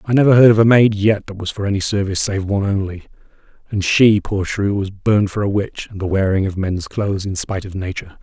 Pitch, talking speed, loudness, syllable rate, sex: 100 Hz, 250 wpm, -17 LUFS, 6.2 syllables/s, male